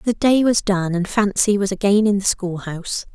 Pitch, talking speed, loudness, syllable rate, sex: 200 Hz, 230 wpm, -19 LUFS, 5.1 syllables/s, female